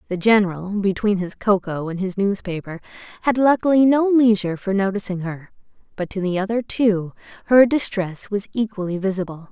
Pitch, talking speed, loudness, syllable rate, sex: 200 Hz, 160 wpm, -20 LUFS, 5.4 syllables/s, female